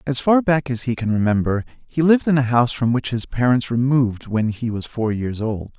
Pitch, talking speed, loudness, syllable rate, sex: 125 Hz, 240 wpm, -20 LUFS, 5.5 syllables/s, male